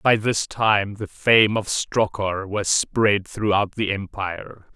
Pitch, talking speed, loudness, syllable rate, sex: 100 Hz, 150 wpm, -21 LUFS, 3.4 syllables/s, male